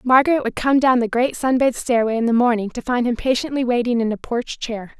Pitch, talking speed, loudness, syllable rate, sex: 245 Hz, 250 wpm, -19 LUFS, 6.0 syllables/s, female